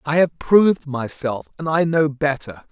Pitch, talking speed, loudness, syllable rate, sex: 145 Hz, 175 wpm, -19 LUFS, 4.5 syllables/s, male